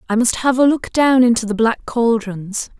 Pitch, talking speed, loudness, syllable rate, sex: 235 Hz, 215 wpm, -16 LUFS, 4.7 syllables/s, female